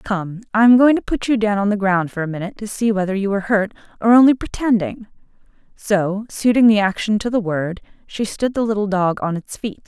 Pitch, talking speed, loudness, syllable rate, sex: 210 Hz, 230 wpm, -18 LUFS, 5.7 syllables/s, female